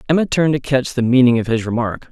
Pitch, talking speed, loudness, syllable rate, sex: 130 Hz, 255 wpm, -16 LUFS, 6.8 syllables/s, male